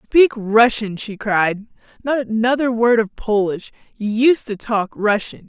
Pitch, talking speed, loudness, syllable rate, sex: 225 Hz, 155 wpm, -18 LUFS, 4.0 syllables/s, female